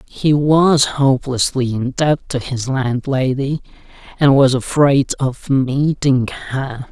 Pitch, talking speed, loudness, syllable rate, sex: 135 Hz, 120 wpm, -16 LUFS, 3.5 syllables/s, male